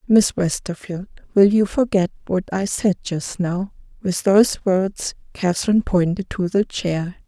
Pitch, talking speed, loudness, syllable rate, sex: 190 Hz, 150 wpm, -20 LUFS, 4.3 syllables/s, female